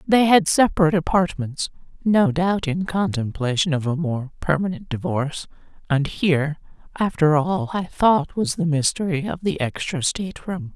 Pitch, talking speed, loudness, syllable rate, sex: 170 Hz, 145 wpm, -21 LUFS, 4.8 syllables/s, female